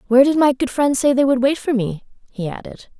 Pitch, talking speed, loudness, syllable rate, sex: 260 Hz, 260 wpm, -18 LUFS, 6.1 syllables/s, female